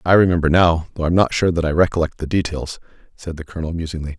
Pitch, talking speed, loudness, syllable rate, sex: 80 Hz, 230 wpm, -18 LUFS, 6.9 syllables/s, male